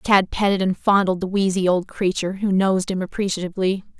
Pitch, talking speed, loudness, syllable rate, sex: 190 Hz, 180 wpm, -21 LUFS, 6.0 syllables/s, female